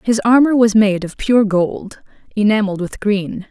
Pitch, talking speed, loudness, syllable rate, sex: 210 Hz, 170 wpm, -15 LUFS, 4.2 syllables/s, female